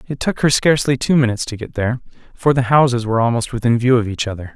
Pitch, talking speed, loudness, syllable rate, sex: 120 Hz, 250 wpm, -17 LUFS, 7.1 syllables/s, male